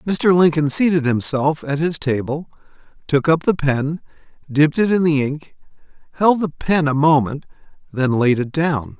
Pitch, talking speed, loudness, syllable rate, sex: 150 Hz, 165 wpm, -18 LUFS, 4.5 syllables/s, male